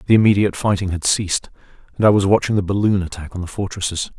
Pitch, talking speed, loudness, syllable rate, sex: 95 Hz, 215 wpm, -18 LUFS, 7.1 syllables/s, male